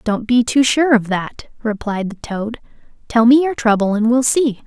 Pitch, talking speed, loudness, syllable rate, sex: 235 Hz, 205 wpm, -16 LUFS, 4.5 syllables/s, female